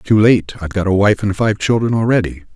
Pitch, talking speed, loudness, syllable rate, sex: 105 Hz, 210 wpm, -15 LUFS, 6.1 syllables/s, male